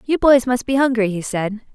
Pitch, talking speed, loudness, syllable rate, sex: 235 Hz, 240 wpm, -18 LUFS, 5.2 syllables/s, female